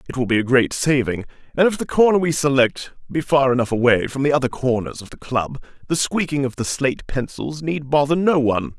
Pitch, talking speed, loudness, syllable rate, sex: 135 Hz, 225 wpm, -19 LUFS, 5.8 syllables/s, male